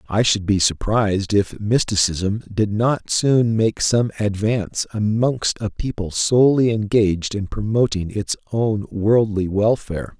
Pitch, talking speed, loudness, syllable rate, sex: 105 Hz, 135 wpm, -19 LUFS, 4.2 syllables/s, male